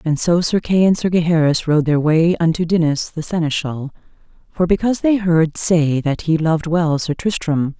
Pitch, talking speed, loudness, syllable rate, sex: 165 Hz, 195 wpm, -17 LUFS, 4.9 syllables/s, female